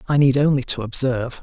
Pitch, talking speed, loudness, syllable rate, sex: 130 Hz, 210 wpm, -18 LUFS, 6.3 syllables/s, male